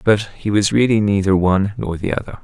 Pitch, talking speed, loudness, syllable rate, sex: 100 Hz, 220 wpm, -17 LUFS, 5.7 syllables/s, male